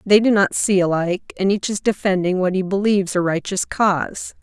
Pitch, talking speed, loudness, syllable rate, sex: 190 Hz, 205 wpm, -19 LUFS, 5.5 syllables/s, female